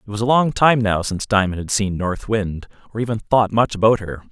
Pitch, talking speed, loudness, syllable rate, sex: 105 Hz, 250 wpm, -19 LUFS, 5.7 syllables/s, male